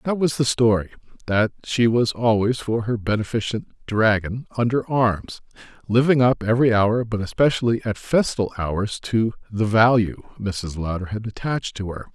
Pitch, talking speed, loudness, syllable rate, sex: 110 Hz, 155 wpm, -21 LUFS, 4.8 syllables/s, male